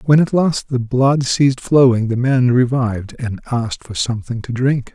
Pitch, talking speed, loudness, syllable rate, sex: 125 Hz, 195 wpm, -17 LUFS, 4.9 syllables/s, male